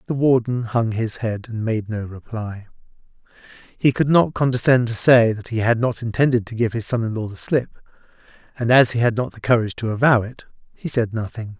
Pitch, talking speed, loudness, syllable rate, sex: 115 Hz, 210 wpm, -20 LUFS, 5.5 syllables/s, male